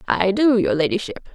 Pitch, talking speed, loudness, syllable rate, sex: 230 Hz, 180 wpm, -19 LUFS, 5.0 syllables/s, female